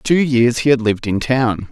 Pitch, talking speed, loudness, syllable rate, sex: 125 Hz, 280 wpm, -16 LUFS, 5.4 syllables/s, male